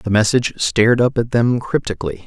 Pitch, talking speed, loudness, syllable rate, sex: 115 Hz, 185 wpm, -17 LUFS, 5.9 syllables/s, male